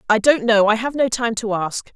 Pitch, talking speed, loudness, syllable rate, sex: 225 Hz, 245 wpm, -18 LUFS, 5.1 syllables/s, female